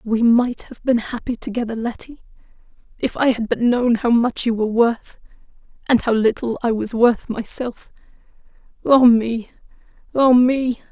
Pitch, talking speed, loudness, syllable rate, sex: 235 Hz, 150 wpm, -18 LUFS, 4.5 syllables/s, female